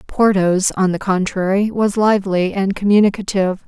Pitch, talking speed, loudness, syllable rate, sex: 195 Hz, 130 wpm, -16 LUFS, 5.1 syllables/s, female